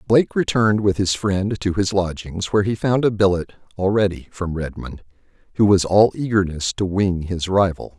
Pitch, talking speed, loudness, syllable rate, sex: 100 Hz, 180 wpm, -19 LUFS, 5.1 syllables/s, male